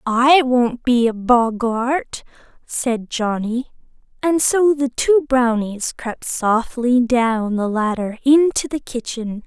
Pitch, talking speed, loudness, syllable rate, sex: 245 Hz, 125 wpm, -18 LUFS, 3.3 syllables/s, female